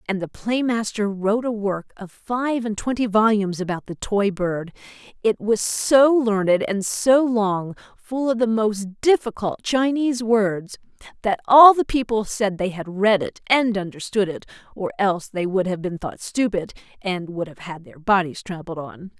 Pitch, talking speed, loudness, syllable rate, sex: 205 Hz, 180 wpm, -21 LUFS, 4.5 syllables/s, female